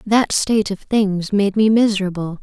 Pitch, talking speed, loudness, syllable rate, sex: 205 Hz, 175 wpm, -17 LUFS, 4.8 syllables/s, female